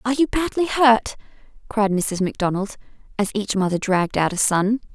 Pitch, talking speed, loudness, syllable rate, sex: 215 Hz, 170 wpm, -20 LUFS, 5.5 syllables/s, female